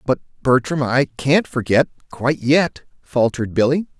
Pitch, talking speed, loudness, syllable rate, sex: 135 Hz, 120 wpm, -19 LUFS, 4.8 syllables/s, male